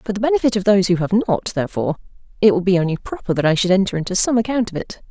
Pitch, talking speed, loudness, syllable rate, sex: 195 Hz, 270 wpm, -18 LUFS, 7.7 syllables/s, female